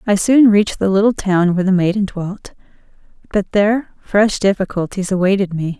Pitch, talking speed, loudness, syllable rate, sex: 195 Hz, 165 wpm, -16 LUFS, 5.5 syllables/s, female